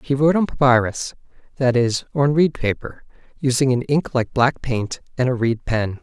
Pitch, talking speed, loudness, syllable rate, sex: 130 Hz, 180 wpm, -20 LUFS, 4.9 syllables/s, male